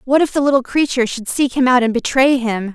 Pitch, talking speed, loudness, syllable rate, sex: 255 Hz, 260 wpm, -16 LUFS, 6.1 syllables/s, female